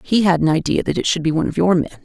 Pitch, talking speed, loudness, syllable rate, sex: 170 Hz, 355 wpm, -17 LUFS, 7.3 syllables/s, female